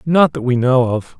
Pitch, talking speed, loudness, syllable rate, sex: 135 Hz, 250 wpm, -15 LUFS, 4.6 syllables/s, male